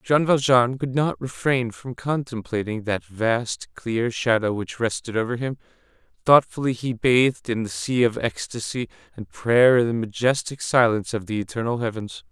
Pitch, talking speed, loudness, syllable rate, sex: 120 Hz, 160 wpm, -22 LUFS, 4.7 syllables/s, male